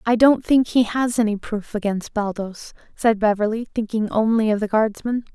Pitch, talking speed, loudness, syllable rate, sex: 220 Hz, 180 wpm, -20 LUFS, 4.9 syllables/s, female